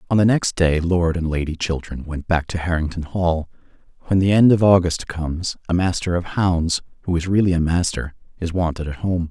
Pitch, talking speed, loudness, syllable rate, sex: 85 Hz, 195 wpm, -20 LUFS, 5.3 syllables/s, male